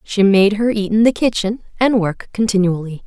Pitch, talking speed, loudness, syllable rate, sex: 205 Hz, 195 wpm, -16 LUFS, 5.1 syllables/s, female